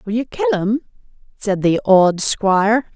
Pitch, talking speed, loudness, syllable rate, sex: 215 Hz, 165 wpm, -17 LUFS, 4.2 syllables/s, female